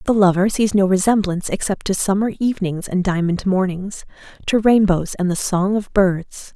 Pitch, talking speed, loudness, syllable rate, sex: 195 Hz, 175 wpm, -18 LUFS, 5.0 syllables/s, female